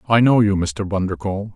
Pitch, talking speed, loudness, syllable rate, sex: 100 Hz, 195 wpm, -19 LUFS, 5.8 syllables/s, male